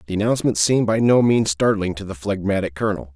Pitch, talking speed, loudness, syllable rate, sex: 100 Hz, 210 wpm, -19 LUFS, 6.7 syllables/s, male